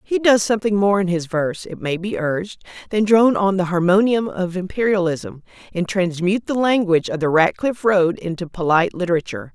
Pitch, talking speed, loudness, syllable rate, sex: 190 Hz, 180 wpm, -19 LUFS, 5.7 syllables/s, female